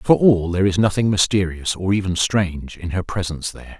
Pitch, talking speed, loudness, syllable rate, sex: 95 Hz, 205 wpm, -19 LUFS, 5.9 syllables/s, male